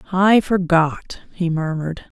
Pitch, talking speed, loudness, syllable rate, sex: 175 Hz, 110 wpm, -18 LUFS, 3.9 syllables/s, female